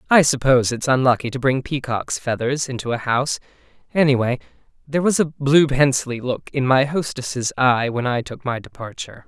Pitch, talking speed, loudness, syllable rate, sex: 130 Hz, 175 wpm, -20 LUFS, 5.5 syllables/s, male